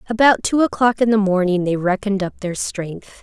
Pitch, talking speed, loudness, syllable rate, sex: 205 Hz, 205 wpm, -18 LUFS, 5.3 syllables/s, female